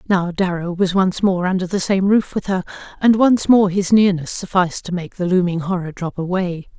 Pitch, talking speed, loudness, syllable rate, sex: 185 Hz, 210 wpm, -18 LUFS, 5.2 syllables/s, female